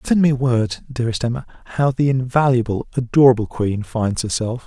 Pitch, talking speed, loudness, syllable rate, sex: 125 Hz, 155 wpm, -19 LUFS, 5.4 syllables/s, male